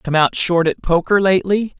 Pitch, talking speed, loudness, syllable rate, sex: 180 Hz, 200 wpm, -16 LUFS, 5.2 syllables/s, male